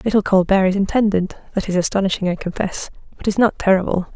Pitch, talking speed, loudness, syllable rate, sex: 195 Hz, 190 wpm, -18 LUFS, 6.3 syllables/s, female